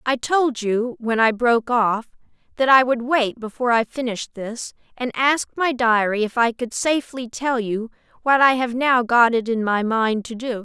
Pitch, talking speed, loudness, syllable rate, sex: 240 Hz, 205 wpm, -20 LUFS, 4.7 syllables/s, female